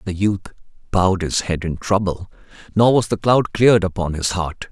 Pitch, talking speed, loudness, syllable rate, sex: 95 Hz, 205 wpm, -19 LUFS, 5.5 syllables/s, male